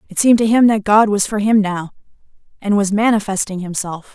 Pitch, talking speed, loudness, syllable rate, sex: 205 Hz, 205 wpm, -15 LUFS, 5.8 syllables/s, female